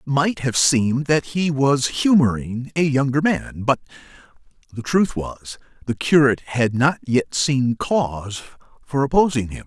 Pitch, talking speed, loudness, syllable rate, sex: 135 Hz, 155 wpm, -20 LUFS, 4.3 syllables/s, male